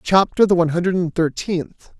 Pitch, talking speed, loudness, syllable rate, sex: 175 Hz, 180 wpm, -18 LUFS, 5.4 syllables/s, male